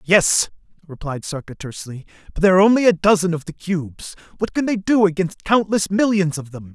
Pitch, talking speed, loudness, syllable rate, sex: 180 Hz, 195 wpm, -18 LUFS, 5.9 syllables/s, male